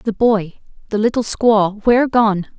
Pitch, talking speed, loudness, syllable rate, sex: 215 Hz, 140 wpm, -16 LUFS, 4.1 syllables/s, female